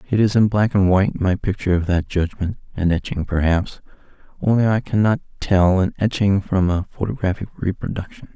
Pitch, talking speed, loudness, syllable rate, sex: 95 Hz, 170 wpm, -20 LUFS, 5.6 syllables/s, male